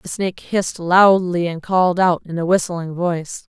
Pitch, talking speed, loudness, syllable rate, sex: 175 Hz, 185 wpm, -18 LUFS, 5.0 syllables/s, female